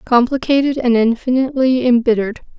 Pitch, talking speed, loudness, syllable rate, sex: 245 Hz, 95 wpm, -15 LUFS, 5.9 syllables/s, female